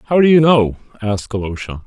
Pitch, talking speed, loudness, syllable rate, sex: 120 Hz, 195 wpm, -15 LUFS, 6.4 syllables/s, male